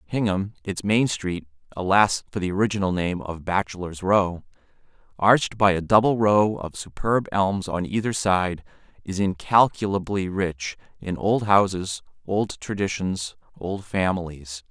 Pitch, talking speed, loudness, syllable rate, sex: 95 Hz, 125 wpm, -23 LUFS, 4.4 syllables/s, male